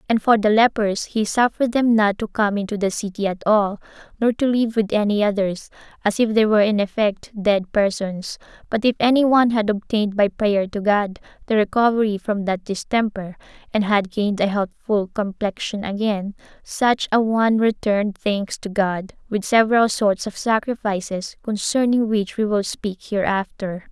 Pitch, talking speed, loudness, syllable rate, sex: 210 Hz, 175 wpm, -20 LUFS, 4.9 syllables/s, female